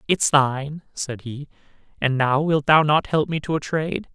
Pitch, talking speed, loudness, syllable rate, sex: 145 Hz, 205 wpm, -21 LUFS, 4.8 syllables/s, male